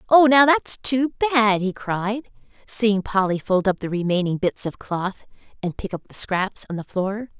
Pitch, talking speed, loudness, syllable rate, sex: 210 Hz, 195 wpm, -21 LUFS, 4.3 syllables/s, female